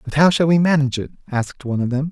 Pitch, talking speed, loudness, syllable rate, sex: 145 Hz, 285 wpm, -18 LUFS, 7.6 syllables/s, male